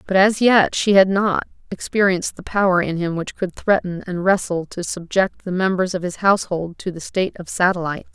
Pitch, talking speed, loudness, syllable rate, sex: 185 Hz, 205 wpm, -19 LUFS, 5.4 syllables/s, female